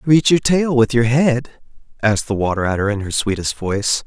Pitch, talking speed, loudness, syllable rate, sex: 120 Hz, 205 wpm, -17 LUFS, 5.3 syllables/s, male